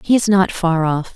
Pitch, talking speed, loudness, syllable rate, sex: 180 Hz, 260 wpm, -16 LUFS, 4.8 syllables/s, female